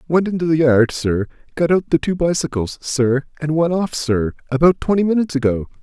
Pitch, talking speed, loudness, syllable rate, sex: 150 Hz, 185 wpm, -18 LUFS, 5.4 syllables/s, male